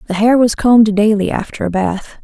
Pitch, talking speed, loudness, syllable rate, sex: 215 Hz, 215 wpm, -13 LUFS, 5.6 syllables/s, female